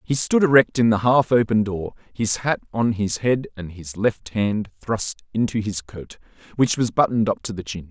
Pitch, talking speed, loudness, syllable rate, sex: 110 Hz, 210 wpm, -21 LUFS, 4.8 syllables/s, male